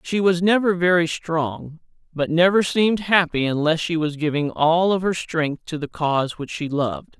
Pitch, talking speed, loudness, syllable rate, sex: 165 Hz, 190 wpm, -20 LUFS, 4.7 syllables/s, male